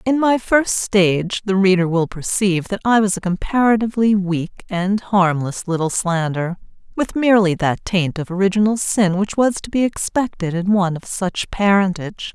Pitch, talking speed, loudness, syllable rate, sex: 195 Hz, 170 wpm, -18 LUFS, 5.0 syllables/s, female